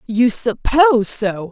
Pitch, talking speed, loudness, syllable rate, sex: 235 Hz, 120 wpm, -16 LUFS, 3.7 syllables/s, female